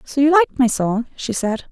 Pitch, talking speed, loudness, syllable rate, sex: 255 Hz, 245 wpm, -18 LUFS, 5.9 syllables/s, female